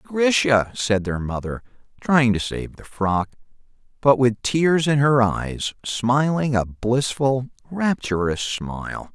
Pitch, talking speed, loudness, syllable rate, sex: 125 Hz, 130 wpm, -21 LUFS, 3.6 syllables/s, male